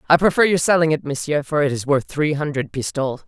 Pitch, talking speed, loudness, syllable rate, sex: 150 Hz, 240 wpm, -19 LUFS, 6.2 syllables/s, female